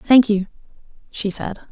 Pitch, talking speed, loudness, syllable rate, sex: 215 Hz, 140 wpm, -19 LUFS, 4.2 syllables/s, female